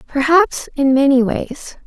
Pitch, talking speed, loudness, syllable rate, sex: 285 Hz, 130 wpm, -15 LUFS, 3.8 syllables/s, female